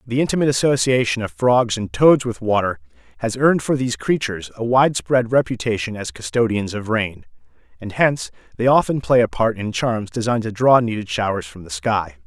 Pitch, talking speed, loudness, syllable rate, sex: 115 Hz, 185 wpm, -19 LUFS, 5.8 syllables/s, male